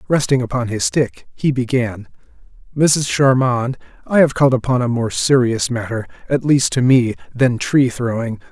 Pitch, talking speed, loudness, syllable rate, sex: 125 Hz, 150 wpm, -17 LUFS, 4.7 syllables/s, male